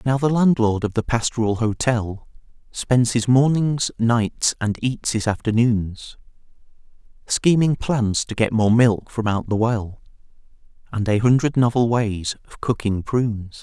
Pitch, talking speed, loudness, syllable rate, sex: 115 Hz, 145 wpm, -20 LUFS, 4.2 syllables/s, male